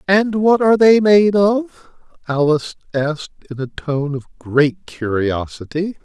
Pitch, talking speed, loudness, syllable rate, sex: 170 Hz, 140 wpm, -16 LUFS, 4.1 syllables/s, male